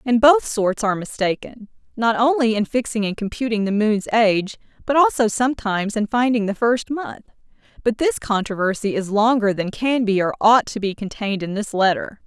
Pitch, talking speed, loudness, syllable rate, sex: 220 Hz, 185 wpm, -20 LUFS, 5.3 syllables/s, female